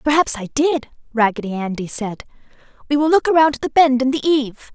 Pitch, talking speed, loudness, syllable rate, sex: 265 Hz, 190 wpm, -18 LUFS, 5.4 syllables/s, female